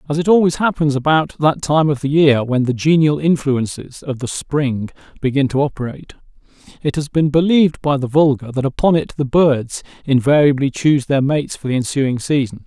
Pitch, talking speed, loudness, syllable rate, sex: 140 Hz, 190 wpm, -16 LUFS, 5.4 syllables/s, male